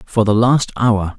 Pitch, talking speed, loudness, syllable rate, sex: 110 Hz, 205 wpm, -15 LUFS, 3.9 syllables/s, male